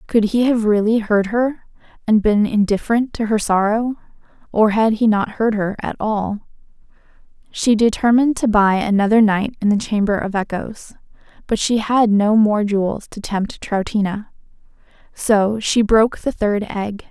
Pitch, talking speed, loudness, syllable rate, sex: 215 Hz, 160 wpm, -17 LUFS, 4.6 syllables/s, female